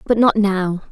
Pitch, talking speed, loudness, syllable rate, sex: 205 Hz, 200 wpm, -17 LUFS, 4.4 syllables/s, female